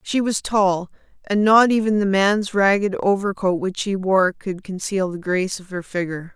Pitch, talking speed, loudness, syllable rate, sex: 195 Hz, 190 wpm, -20 LUFS, 4.8 syllables/s, female